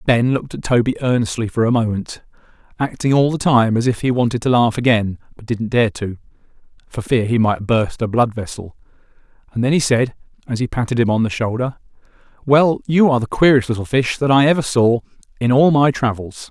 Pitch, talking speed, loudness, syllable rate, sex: 120 Hz, 205 wpm, -17 LUFS, 5.7 syllables/s, male